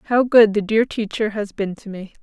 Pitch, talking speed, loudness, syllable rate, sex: 210 Hz, 245 wpm, -18 LUFS, 4.7 syllables/s, female